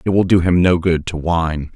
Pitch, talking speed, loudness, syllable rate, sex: 85 Hz, 275 wpm, -16 LUFS, 5.5 syllables/s, male